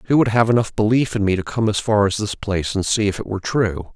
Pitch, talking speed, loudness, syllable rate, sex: 105 Hz, 305 wpm, -19 LUFS, 6.5 syllables/s, male